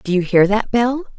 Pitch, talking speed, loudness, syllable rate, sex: 215 Hz, 255 wpm, -16 LUFS, 5.1 syllables/s, female